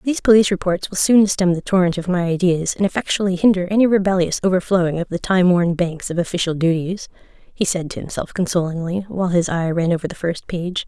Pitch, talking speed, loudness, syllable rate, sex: 180 Hz, 210 wpm, -18 LUFS, 6.1 syllables/s, female